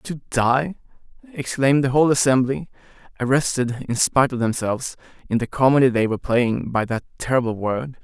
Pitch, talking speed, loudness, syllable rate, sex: 130 Hz, 155 wpm, -20 LUFS, 5.6 syllables/s, male